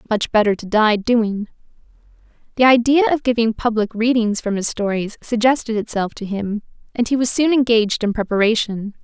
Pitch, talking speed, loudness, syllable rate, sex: 225 Hz, 165 wpm, -18 LUFS, 5.3 syllables/s, female